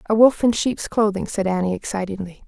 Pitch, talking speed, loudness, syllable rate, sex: 205 Hz, 195 wpm, -20 LUFS, 5.8 syllables/s, female